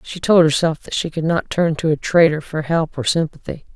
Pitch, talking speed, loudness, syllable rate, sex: 160 Hz, 240 wpm, -18 LUFS, 5.3 syllables/s, female